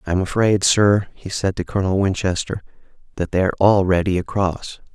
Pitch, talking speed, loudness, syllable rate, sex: 95 Hz, 145 wpm, -19 LUFS, 5.1 syllables/s, male